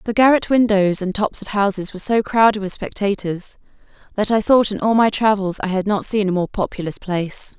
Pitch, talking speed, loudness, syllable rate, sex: 205 Hz, 215 wpm, -18 LUFS, 5.5 syllables/s, female